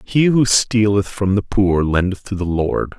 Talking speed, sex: 200 wpm, male